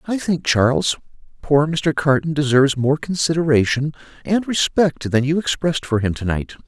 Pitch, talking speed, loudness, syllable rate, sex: 145 Hz, 160 wpm, -19 LUFS, 5.1 syllables/s, male